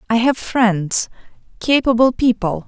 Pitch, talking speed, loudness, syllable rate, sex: 230 Hz, 110 wpm, -16 LUFS, 4.0 syllables/s, female